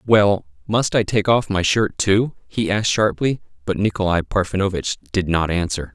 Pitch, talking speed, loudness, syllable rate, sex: 100 Hz, 170 wpm, -20 LUFS, 4.9 syllables/s, male